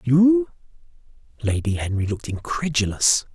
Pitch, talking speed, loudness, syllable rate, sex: 135 Hz, 90 wpm, -21 LUFS, 4.9 syllables/s, male